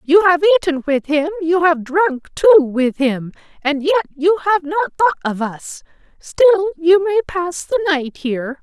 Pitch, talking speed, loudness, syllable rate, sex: 325 Hz, 180 wpm, -16 LUFS, 4.6 syllables/s, female